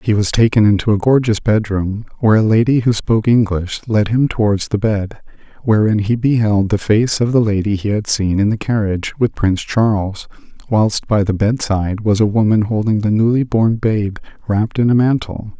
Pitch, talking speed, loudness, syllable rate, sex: 110 Hz, 195 wpm, -15 LUFS, 5.2 syllables/s, male